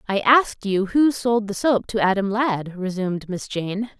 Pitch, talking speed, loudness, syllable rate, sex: 210 Hz, 195 wpm, -21 LUFS, 4.6 syllables/s, female